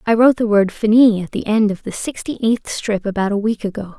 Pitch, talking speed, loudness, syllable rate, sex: 215 Hz, 255 wpm, -17 LUFS, 5.8 syllables/s, female